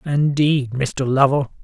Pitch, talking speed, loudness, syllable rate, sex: 135 Hz, 110 wpm, -18 LUFS, 3.5 syllables/s, male